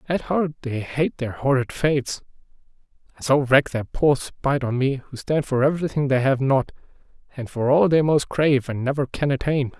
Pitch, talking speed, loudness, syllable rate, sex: 140 Hz, 195 wpm, -22 LUFS, 5.3 syllables/s, male